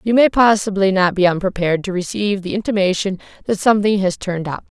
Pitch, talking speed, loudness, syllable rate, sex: 195 Hz, 190 wpm, -17 LUFS, 6.5 syllables/s, female